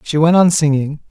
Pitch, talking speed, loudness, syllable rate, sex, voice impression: 155 Hz, 220 wpm, -13 LUFS, 5.3 syllables/s, male, very masculine, very adult-like, middle-aged, very thick, slightly relaxed, slightly powerful, weak, slightly dark, soft, clear, fluent, cool, very intellectual, slightly refreshing, sincere, very calm, mature, friendly, reassuring, unique, slightly elegant, wild, sweet, lively